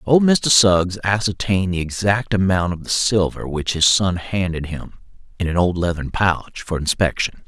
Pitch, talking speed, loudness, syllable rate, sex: 90 Hz, 175 wpm, -19 LUFS, 4.6 syllables/s, male